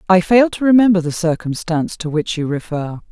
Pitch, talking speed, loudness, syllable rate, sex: 180 Hz, 195 wpm, -16 LUFS, 5.6 syllables/s, female